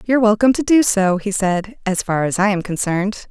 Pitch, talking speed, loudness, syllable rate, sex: 205 Hz, 235 wpm, -17 LUFS, 5.7 syllables/s, female